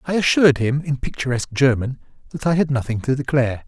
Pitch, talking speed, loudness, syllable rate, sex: 135 Hz, 195 wpm, -19 LUFS, 6.7 syllables/s, male